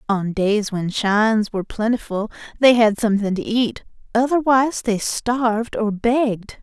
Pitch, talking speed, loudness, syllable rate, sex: 220 Hz, 145 wpm, -19 LUFS, 4.6 syllables/s, female